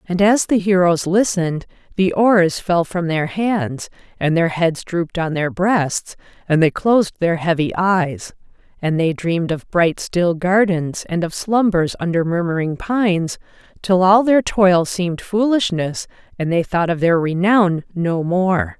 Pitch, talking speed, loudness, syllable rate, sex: 180 Hz, 165 wpm, -17 LUFS, 4.2 syllables/s, female